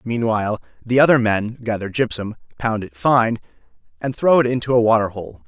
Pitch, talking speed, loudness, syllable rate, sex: 115 Hz, 175 wpm, -19 LUFS, 5.4 syllables/s, male